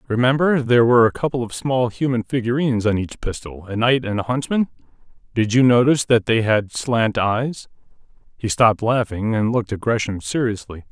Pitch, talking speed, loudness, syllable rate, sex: 115 Hz, 180 wpm, -19 LUFS, 5.6 syllables/s, male